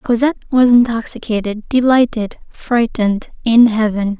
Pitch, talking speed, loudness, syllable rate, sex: 230 Hz, 100 wpm, -15 LUFS, 4.8 syllables/s, female